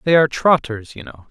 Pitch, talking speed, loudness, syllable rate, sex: 135 Hz, 230 wpm, -16 LUFS, 6.0 syllables/s, male